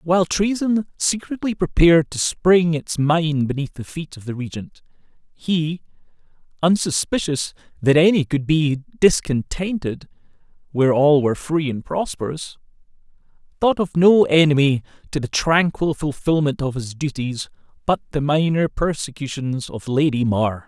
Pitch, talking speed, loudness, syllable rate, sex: 155 Hz, 130 wpm, -20 LUFS, 4.5 syllables/s, male